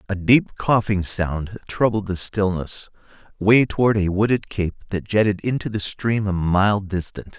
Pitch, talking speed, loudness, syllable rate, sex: 100 Hz, 165 wpm, -20 LUFS, 4.3 syllables/s, male